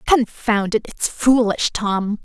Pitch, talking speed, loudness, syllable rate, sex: 220 Hz, 135 wpm, -19 LUFS, 3.4 syllables/s, female